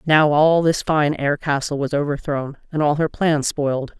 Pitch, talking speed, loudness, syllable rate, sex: 150 Hz, 195 wpm, -19 LUFS, 4.5 syllables/s, female